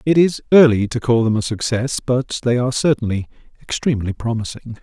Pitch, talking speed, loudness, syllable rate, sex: 120 Hz, 175 wpm, -18 LUFS, 5.7 syllables/s, male